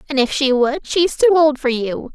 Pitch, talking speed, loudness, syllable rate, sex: 285 Hz, 280 wpm, -16 LUFS, 5.2 syllables/s, female